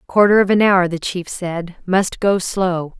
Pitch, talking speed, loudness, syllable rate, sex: 185 Hz, 200 wpm, -17 LUFS, 4.0 syllables/s, female